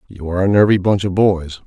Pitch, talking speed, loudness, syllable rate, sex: 95 Hz, 250 wpm, -16 LUFS, 6.1 syllables/s, male